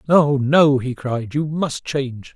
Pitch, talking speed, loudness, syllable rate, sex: 140 Hz, 180 wpm, -19 LUFS, 3.7 syllables/s, male